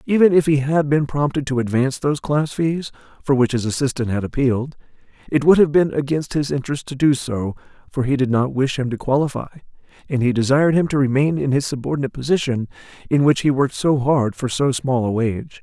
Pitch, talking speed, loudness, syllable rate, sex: 135 Hz, 215 wpm, -19 LUFS, 6.0 syllables/s, male